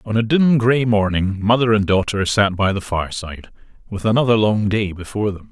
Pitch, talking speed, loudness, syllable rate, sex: 105 Hz, 195 wpm, -18 LUFS, 5.7 syllables/s, male